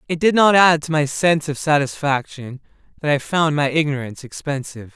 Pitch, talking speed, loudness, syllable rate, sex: 150 Hz, 180 wpm, -18 LUFS, 5.7 syllables/s, male